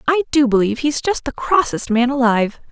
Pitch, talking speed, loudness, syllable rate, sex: 260 Hz, 200 wpm, -17 LUFS, 5.9 syllables/s, female